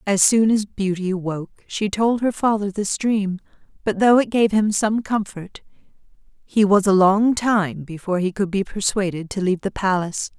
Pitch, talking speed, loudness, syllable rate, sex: 200 Hz, 185 wpm, -20 LUFS, 5.0 syllables/s, female